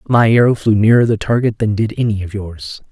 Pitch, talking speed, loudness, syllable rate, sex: 110 Hz, 225 wpm, -14 LUFS, 5.6 syllables/s, male